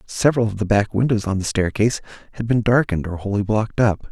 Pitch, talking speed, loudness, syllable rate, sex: 105 Hz, 220 wpm, -20 LUFS, 6.7 syllables/s, male